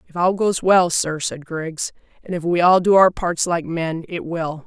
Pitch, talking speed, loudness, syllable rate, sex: 170 Hz, 230 wpm, -19 LUFS, 4.3 syllables/s, female